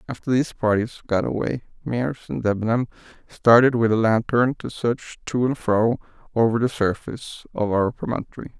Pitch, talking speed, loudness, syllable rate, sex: 115 Hz, 160 wpm, -22 LUFS, 5.4 syllables/s, male